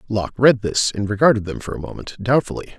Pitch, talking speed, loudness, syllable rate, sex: 110 Hz, 215 wpm, -19 LUFS, 6.4 syllables/s, male